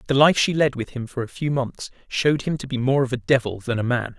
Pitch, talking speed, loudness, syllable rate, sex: 130 Hz, 300 wpm, -22 LUFS, 6.0 syllables/s, male